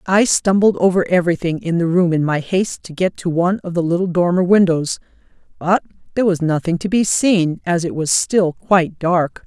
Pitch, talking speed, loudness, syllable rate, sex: 175 Hz, 205 wpm, -17 LUFS, 5.4 syllables/s, female